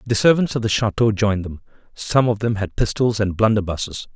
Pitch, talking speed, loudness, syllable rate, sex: 110 Hz, 200 wpm, -19 LUFS, 5.8 syllables/s, male